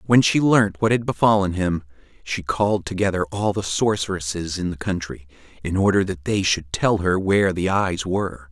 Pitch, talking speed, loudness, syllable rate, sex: 95 Hz, 190 wpm, -21 LUFS, 5.1 syllables/s, male